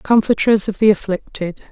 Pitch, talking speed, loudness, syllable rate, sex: 205 Hz, 140 wpm, -16 LUFS, 5.0 syllables/s, female